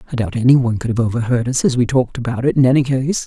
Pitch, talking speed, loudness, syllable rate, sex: 125 Hz, 275 wpm, -16 LUFS, 7.3 syllables/s, female